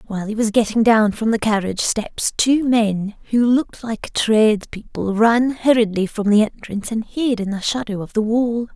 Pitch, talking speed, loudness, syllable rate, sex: 220 Hz, 190 wpm, -18 LUFS, 4.9 syllables/s, female